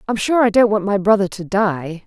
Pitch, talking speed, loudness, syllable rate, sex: 200 Hz, 260 wpm, -16 LUFS, 5.2 syllables/s, female